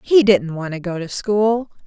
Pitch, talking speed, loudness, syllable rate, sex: 200 Hz, 225 wpm, -19 LUFS, 4.3 syllables/s, female